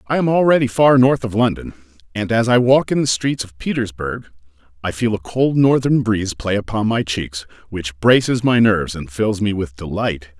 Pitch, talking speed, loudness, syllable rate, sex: 110 Hz, 200 wpm, -17 LUFS, 5.1 syllables/s, male